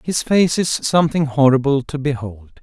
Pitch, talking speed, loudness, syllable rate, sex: 140 Hz, 160 wpm, -17 LUFS, 5.0 syllables/s, male